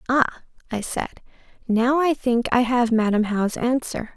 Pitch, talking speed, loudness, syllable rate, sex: 240 Hz, 160 wpm, -22 LUFS, 4.6 syllables/s, female